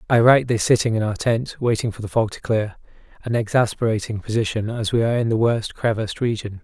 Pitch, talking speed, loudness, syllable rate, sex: 115 Hz, 210 wpm, -21 LUFS, 6.2 syllables/s, male